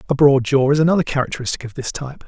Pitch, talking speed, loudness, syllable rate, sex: 140 Hz, 235 wpm, -18 LUFS, 7.7 syllables/s, male